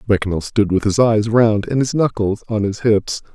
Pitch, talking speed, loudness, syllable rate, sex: 105 Hz, 215 wpm, -17 LUFS, 5.0 syllables/s, male